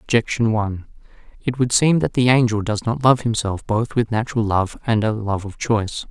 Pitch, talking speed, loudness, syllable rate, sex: 115 Hz, 205 wpm, -20 LUFS, 5.3 syllables/s, male